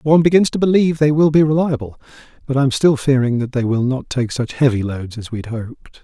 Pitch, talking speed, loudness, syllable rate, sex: 135 Hz, 240 wpm, -17 LUFS, 6.1 syllables/s, male